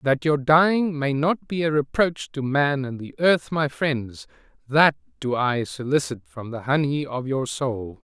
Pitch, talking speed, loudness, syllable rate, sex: 140 Hz, 185 wpm, -23 LUFS, 4.1 syllables/s, male